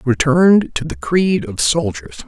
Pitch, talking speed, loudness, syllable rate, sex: 140 Hz, 185 wpm, -15 LUFS, 4.7 syllables/s, male